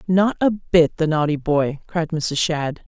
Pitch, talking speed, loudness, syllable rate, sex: 160 Hz, 180 wpm, -20 LUFS, 3.8 syllables/s, female